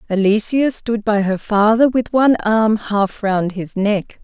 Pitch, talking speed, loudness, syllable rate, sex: 215 Hz, 170 wpm, -16 LUFS, 4.1 syllables/s, female